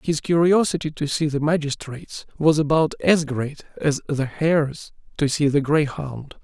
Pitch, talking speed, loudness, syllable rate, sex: 150 Hz, 160 wpm, -21 LUFS, 4.6 syllables/s, male